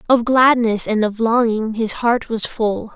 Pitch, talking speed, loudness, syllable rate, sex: 225 Hz, 185 wpm, -17 LUFS, 4.0 syllables/s, female